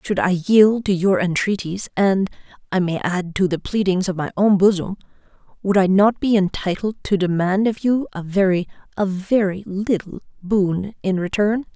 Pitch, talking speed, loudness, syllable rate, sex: 190 Hz, 160 wpm, -19 LUFS, 4.7 syllables/s, female